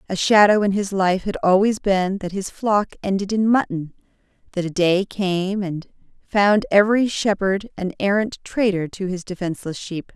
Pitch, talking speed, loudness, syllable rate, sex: 195 Hz, 165 wpm, -20 LUFS, 4.7 syllables/s, female